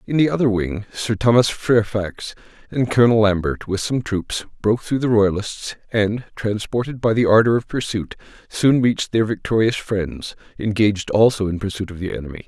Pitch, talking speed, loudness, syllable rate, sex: 110 Hz, 175 wpm, -19 LUFS, 5.2 syllables/s, male